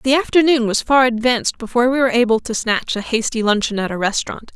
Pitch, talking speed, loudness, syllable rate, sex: 240 Hz, 225 wpm, -17 LUFS, 6.4 syllables/s, female